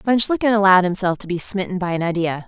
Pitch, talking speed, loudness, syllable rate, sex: 190 Hz, 245 wpm, -18 LUFS, 6.8 syllables/s, female